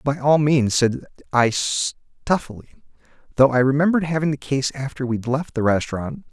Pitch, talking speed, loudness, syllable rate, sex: 135 Hz, 160 wpm, -20 LUFS, 5.0 syllables/s, male